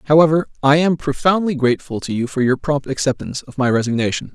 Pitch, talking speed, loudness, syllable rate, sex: 140 Hz, 195 wpm, -18 LUFS, 6.3 syllables/s, male